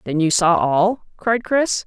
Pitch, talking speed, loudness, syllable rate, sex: 200 Hz, 195 wpm, -18 LUFS, 3.6 syllables/s, female